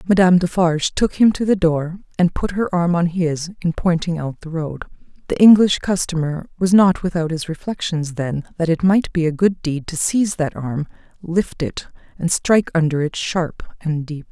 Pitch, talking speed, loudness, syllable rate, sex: 170 Hz, 195 wpm, -19 LUFS, 4.9 syllables/s, female